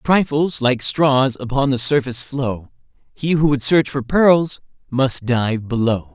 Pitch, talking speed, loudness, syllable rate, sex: 135 Hz, 155 wpm, -18 LUFS, 4.0 syllables/s, male